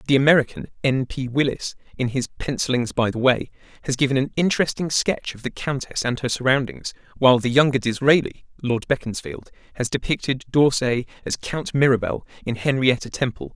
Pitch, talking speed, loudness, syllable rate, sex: 130 Hz, 165 wpm, -22 LUFS, 5.5 syllables/s, male